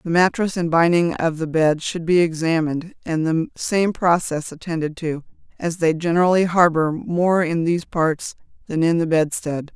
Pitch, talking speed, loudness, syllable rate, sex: 165 Hz, 170 wpm, -20 LUFS, 4.8 syllables/s, female